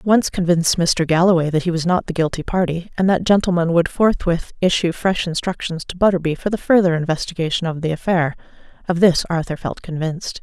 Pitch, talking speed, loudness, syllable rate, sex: 175 Hz, 190 wpm, -18 LUFS, 5.8 syllables/s, female